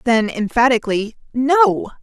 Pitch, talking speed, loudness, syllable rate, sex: 240 Hz, 90 wpm, -17 LUFS, 4.2 syllables/s, female